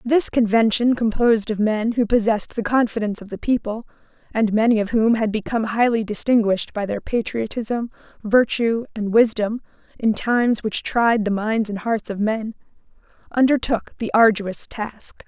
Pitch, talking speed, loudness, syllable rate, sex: 220 Hz, 155 wpm, -20 LUFS, 5.0 syllables/s, female